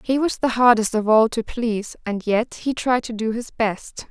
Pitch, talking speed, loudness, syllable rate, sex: 230 Hz, 235 wpm, -21 LUFS, 4.7 syllables/s, female